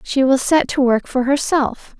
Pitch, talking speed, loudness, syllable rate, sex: 265 Hz, 210 wpm, -17 LUFS, 4.2 syllables/s, female